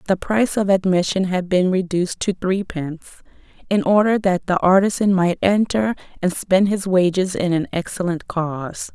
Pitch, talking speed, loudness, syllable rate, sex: 185 Hz, 160 wpm, -19 LUFS, 5.1 syllables/s, female